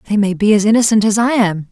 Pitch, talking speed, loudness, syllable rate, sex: 210 Hz, 280 wpm, -13 LUFS, 6.6 syllables/s, female